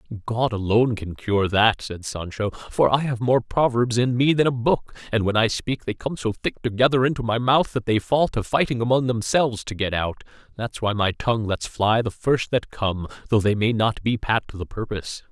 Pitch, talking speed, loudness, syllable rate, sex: 115 Hz, 225 wpm, -22 LUFS, 5.3 syllables/s, male